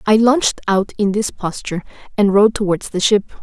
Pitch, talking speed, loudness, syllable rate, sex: 205 Hz, 195 wpm, -16 LUFS, 6.0 syllables/s, female